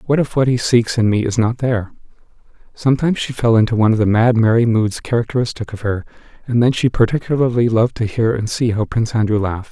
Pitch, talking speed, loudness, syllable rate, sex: 115 Hz, 220 wpm, -17 LUFS, 6.6 syllables/s, male